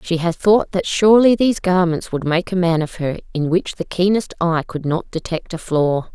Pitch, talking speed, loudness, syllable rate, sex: 175 Hz, 225 wpm, -18 LUFS, 5.0 syllables/s, female